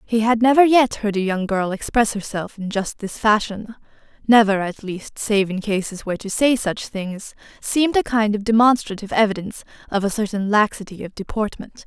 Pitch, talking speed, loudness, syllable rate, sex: 210 Hz, 185 wpm, -20 LUFS, 5.3 syllables/s, female